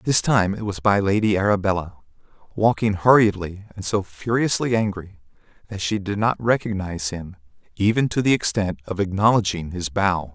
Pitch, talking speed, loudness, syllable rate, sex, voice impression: 100 Hz, 155 wpm, -21 LUFS, 5.2 syllables/s, male, very masculine, slightly young, adult-like, thick, tensed, powerful, bright, soft, very clear, fluent, slightly raspy, very cool, very intellectual, very refreshing, very sincere, very calm, mature, very friendly, very reassuring, unique, very elegant, slightly wild, very sweet, lively, kind, slightly modest